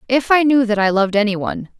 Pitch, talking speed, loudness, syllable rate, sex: 225 Hz, 265 wpm, -16 LUFS, 7.1 syllables/s, female